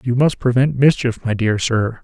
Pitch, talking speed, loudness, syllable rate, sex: 120 Hz, 205 wpm, -17 LUFS, 4.7 syllables/s, male